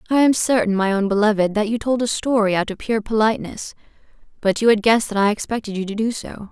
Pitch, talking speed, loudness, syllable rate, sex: 215 Hz, 240 wpm, -19 LUFS, 6.4 syllables/s, female